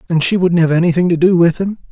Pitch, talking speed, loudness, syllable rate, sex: 170 Hz, 280 wpm, -13 LUFS, 6.8 syllables/s, male